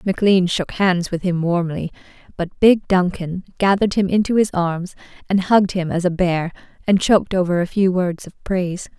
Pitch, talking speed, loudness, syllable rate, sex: 185 Hz, 185 wpm, -19 LUFS, 5.2 syllables/s, female